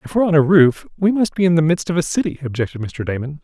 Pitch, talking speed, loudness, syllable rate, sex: 160 Hz, 295 wpm, -17 LUFS, 6.9 syllables/s, male